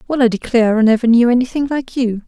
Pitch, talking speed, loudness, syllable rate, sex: 240 Hz, 235 wpm, -14 LUFS, 6.6 syllables/s, female